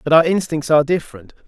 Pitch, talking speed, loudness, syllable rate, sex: 155 Hz, 205 wpm, -17 LUFS, 7.1 syllables/s, male